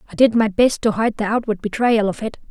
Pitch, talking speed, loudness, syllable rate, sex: 215 Hz, 265 wpm, -18 LUFS, 6.1 syllables/s, female